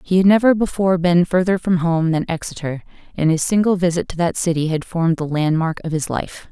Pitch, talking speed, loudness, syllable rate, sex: 170 Hz, 220 wpm, -18 LUFS, 5.8 syllables/s, female